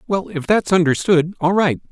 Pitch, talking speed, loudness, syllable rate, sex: 175 Hz, 190 wpm, -17 LUFS, 5.0 syllables/s, male